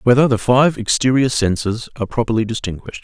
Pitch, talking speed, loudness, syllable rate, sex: 120 Hz, 160 wpm, -17 LUFS, 6.2 syllables/s, male